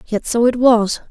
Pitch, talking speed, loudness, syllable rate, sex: 235 Hz, 215 wpm, -15 LUFS, 4.4 syllables/s, female